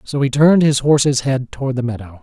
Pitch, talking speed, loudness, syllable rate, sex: 135 Hz, 245 wpm, -16 LUFS, 6.3 syllables/s, male